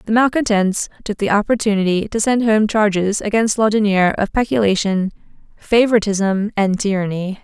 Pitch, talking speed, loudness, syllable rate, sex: 205 Hz, 130 wpm, -17 LUFS, 5.3 syllables/s, female